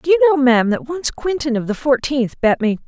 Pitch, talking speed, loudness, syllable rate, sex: 270 Hz, 250 wpm, -17 LUFS, 5.9 syllables/s, female